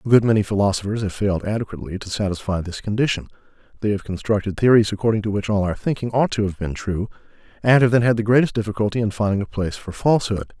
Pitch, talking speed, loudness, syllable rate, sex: 105 Hz, 220 wpm, -21 LUFS, 7.1 syllables/s, male